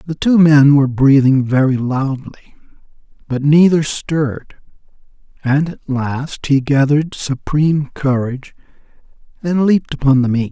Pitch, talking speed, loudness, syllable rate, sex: 140 Hz, 125 wpm, -15 LUFS, 4.7 syllables/s, male